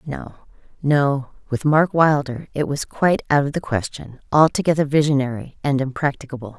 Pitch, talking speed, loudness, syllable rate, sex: 140 Hz, 135 wpm, -20 LUFS, 5.2 syllables/s, female